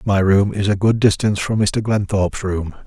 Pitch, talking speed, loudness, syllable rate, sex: 100 Hz, 210 wpm, -18 LUFS, 5.2 syllables/s, male